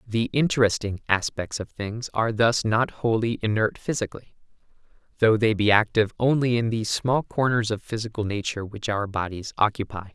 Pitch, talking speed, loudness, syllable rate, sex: 110 Hz, 160 wpm, -24 LUFS, 5.5 syllables/s, male